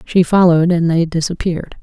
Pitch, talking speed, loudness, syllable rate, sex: 170 Hz, 165 wpm, -14 LUFS, 5.8 syllables/s, female